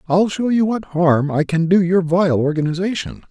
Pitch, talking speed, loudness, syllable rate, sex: 175 Hz, 200 wpm, -17 LUFS, 4.8 syllables/s, male